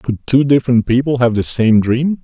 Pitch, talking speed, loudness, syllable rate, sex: 125 Hz, 215 wpm, -14 LUFS, 5.0 syllables/s, male